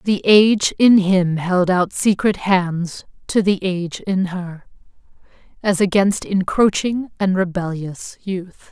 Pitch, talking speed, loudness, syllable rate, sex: 190 Hz, 125 wpm, -18 LUFS, 3.7 syllables/s, female